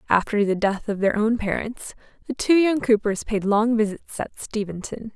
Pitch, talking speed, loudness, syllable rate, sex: 215 Hz, 185 wpm, -22 LUFS, 4.8 syllables/s, female